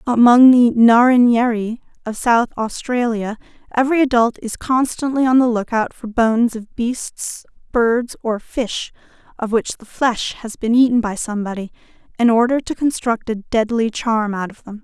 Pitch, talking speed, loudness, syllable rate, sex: 230 Hz, 160 wpm, -17 LUFS, 4.7 syllables/s, female